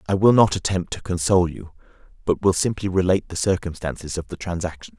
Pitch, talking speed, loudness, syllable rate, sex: 90 Hz, 195 wpm, -22 LUFS, 6.2 syllables/s, male